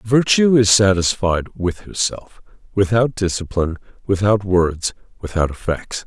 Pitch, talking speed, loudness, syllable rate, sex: 100 Hz, 110 wpm, -18 LUFS, 4.3 syllables/s, male